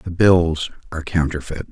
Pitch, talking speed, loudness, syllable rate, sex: 80 Hz, 140 wpm, -19 LUFS, 4.8 syllables/s, male